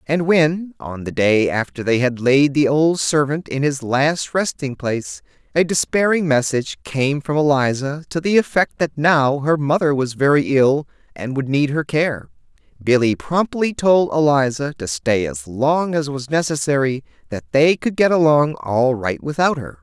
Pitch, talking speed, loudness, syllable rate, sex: 140 Hz, 170 wpm, -18 LUFS, 4.4 syllables/s, male